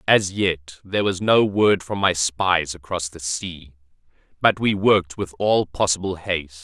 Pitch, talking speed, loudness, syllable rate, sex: 90 Hz, 170 wpm, -21 LUFS, 4.4 syllables/s, male